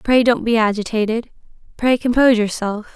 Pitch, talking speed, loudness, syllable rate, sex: 230 Hz, 140 wpm, -17 LUFS, 5.6 syllables/s, female